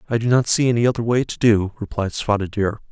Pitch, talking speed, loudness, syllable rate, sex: 110 Hz, 245 wpm, -19 LUFS, 6.3 syllables/s, male